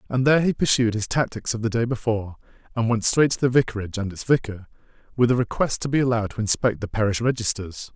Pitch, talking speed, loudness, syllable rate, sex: 115 Hz, 225 wpm, -22 LUFS, 6.7 syllables/s, male